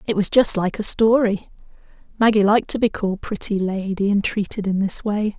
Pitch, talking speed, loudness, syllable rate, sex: 205 Hz, 200 wpm, -19 LUFS, 5.5 syllables/s, female